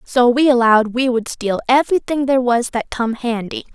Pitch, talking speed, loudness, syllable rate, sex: 245 Hz, 190 wpm, -16 LUFS, 5.4 syllables/s, female